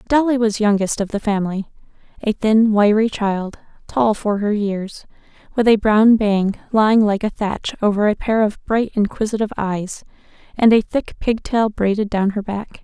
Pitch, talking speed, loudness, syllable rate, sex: 210 Hz, 175 wpm, -18 LUFS, 4.8 syllables/s, female